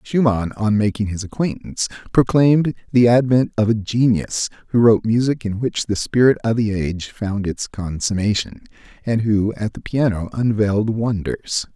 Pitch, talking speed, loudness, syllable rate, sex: 110 Hz, 160 wpm, -19 LUFS, 4.9 syllables/s, male